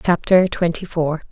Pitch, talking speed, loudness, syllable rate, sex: 170 Hz, 135 wpm, -18 LUFS, 4.4 syllables/s, female